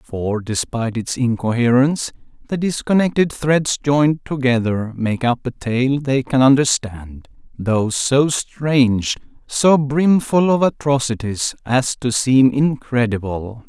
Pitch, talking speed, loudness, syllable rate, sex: 130 Hz, 120 wpm, -18 LUFS, 3.9 syllables/s, male